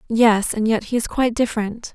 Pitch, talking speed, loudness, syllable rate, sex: 225 Hz, 215 wpm, -20 LUFS, 5.7 syllables/s, female